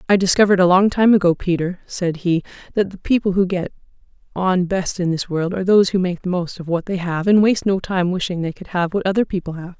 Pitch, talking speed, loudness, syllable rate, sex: 185 Hz, 250 wpm, -18 LUFS, 6.2 syllables/s, female